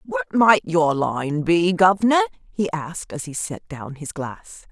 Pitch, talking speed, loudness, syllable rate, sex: 170 Hz, 180 wpm, -21 LUFS, 3.7 syllables/s, female